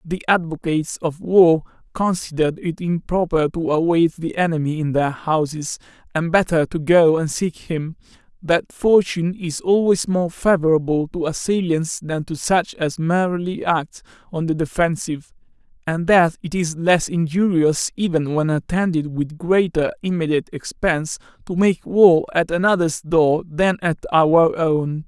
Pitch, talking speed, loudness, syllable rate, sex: 165 Hz, 145 wpm, -19 LUFS, 4.5 syllables/s, male